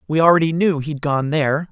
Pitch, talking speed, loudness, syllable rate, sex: 155 Hz, 210 wpm, -18 LUFS, 5.8 syllables/s, male